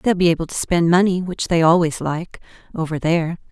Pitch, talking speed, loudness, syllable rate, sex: 170 Hz, 205 wpm, -19 LUFS, 5.7 syllables/s, female